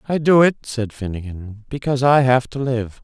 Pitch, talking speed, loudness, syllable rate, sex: 125 Hz, 200 wpm, -18 LUFS, 5.1 syllables/s, male